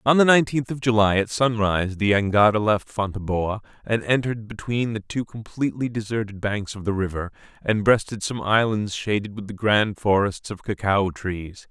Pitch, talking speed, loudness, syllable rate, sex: 105 Hz, 175 wpm, -22 LUFS, 5.2 syllables/s, male